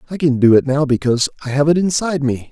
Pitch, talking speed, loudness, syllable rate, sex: 140 Hz, 265 wpm, -16 LUFS, 7.0 syllables/s, male